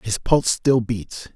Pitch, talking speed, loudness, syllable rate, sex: 115 Hz, 175 wpm, -20 LUFS, 4.0 syllables/s, male